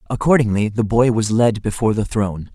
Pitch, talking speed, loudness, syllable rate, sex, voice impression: 110 Hz, 190 wpm, -18 LUFS, 6.0 syllables/s, male, masculine, adult-like, tensed, powerful, slightly bright, clear, slightly fluent, cool, intellectual, refreshing, calm, friendly, reassuring, lively, slightly kind